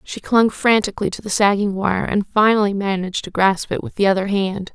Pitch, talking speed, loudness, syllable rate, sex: 200 Hz, 215 wpm, -18 LUFS, 5.6 syllables/s, female